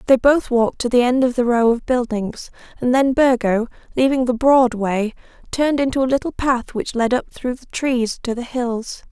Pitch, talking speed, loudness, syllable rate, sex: 245 Hz, 210 wpm, -18 LUFS, 4.9 syllables/s, female